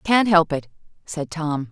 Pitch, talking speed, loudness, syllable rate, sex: 165 Hz, 175 wpm, -21 LUFS, 4.0 syllables/s, female